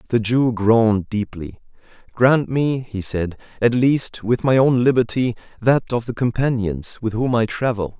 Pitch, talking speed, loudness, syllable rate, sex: 115 Hz, 160 wpm, -19 LUFS, 4.3 syllables/s, male